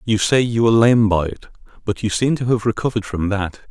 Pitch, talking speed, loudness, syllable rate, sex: 110 Hz, 225 wpm, -18 LUFS, 6.2 syllables/s, male